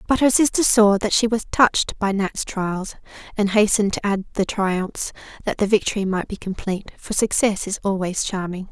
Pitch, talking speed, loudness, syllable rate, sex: 205 Hz, 195 wpm, -20 LUFS, 5.2 syllables/s, female